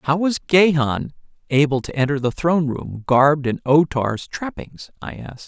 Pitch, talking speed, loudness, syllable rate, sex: 145 Hz, 175 wpm, -19 LUFS, 4.7 syllables/s, male